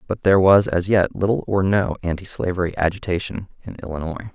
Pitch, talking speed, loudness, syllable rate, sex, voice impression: 90 Hz, 165 wpm, -20 LUFS, 6.1 syllables/s, male, very masculine, middle-aged, very thick, tensed, slightly powerful, dark, slightly soft, muffled, fluent, slightly raspy, cool, intellectual, slightly refreshing, sincere, calm, friendly, reassuring, very unique, slightly elegant, wild, sweet, slightly lively, kind, modest